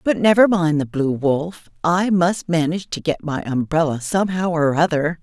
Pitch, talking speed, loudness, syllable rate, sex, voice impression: 165 Hz, 185 wpm, -19 LUFS, 4.8 syllables/s, female, slightly feminine, adult-like, slightly fluent, slightly refreshing, unique